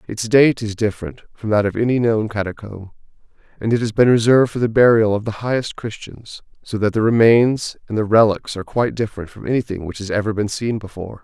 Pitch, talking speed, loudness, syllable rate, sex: 110 Hz, 215 wpm, -18 LUFS, 6.1 syllables/s, male